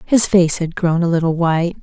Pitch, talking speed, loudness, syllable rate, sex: 170 Hz, 230 wpm, -16 LUFS, 5.3 syllables/s, female